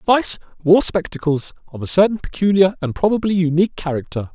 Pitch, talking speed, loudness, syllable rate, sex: 175 Hz, 150 wpm, -18 LUFS, 5.8 syllables/s, male